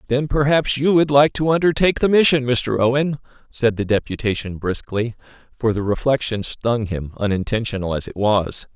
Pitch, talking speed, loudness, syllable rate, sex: 125 Hz, 165 wpm, -19 LUFS, 5.1 syllables/s, male